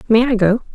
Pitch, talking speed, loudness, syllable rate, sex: 225 Hz, 245 wpm, -15 LUFS, 5.9 syllables/s, female